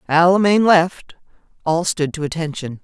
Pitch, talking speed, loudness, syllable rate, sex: 165 Hz, 170 wpm, -17 LUFS, 4.7 syllables/s, female